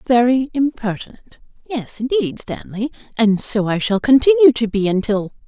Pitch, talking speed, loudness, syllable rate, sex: 235 Hz, 140 wpm, -17 LUFS, 4.7 syllables/s, female